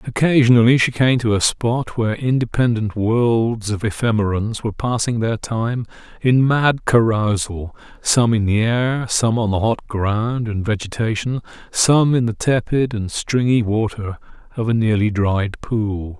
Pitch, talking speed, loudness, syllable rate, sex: 115 Hz, 150 wpm, -18 LUFS, 4.3 syllables/s, male